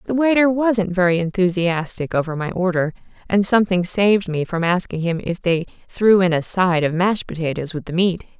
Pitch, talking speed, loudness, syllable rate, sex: 185 Hz, 195 wpm, -19 LUFS, 5.3 syllables/s, female